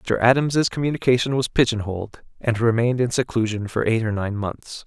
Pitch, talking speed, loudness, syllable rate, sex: 115 Hz, 185 wpm, -21 LUFS, 5.6 syllables/s, male